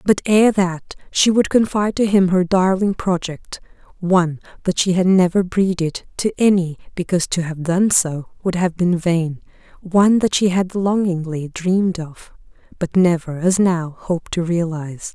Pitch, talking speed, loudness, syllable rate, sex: 180 Hz, 165 wpm, -18 LUFS, 4.7 syllables/s, female